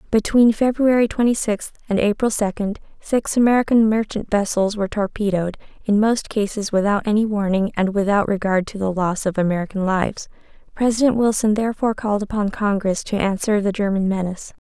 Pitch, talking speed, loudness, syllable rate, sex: 210 Hz, 160 wpm, -20 LUFS, 5.7 syllables/s, female